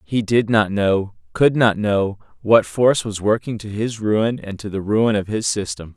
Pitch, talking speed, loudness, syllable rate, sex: 110 Hz, 210 wpm, -19 LUFS, 4.4 syllables/s, male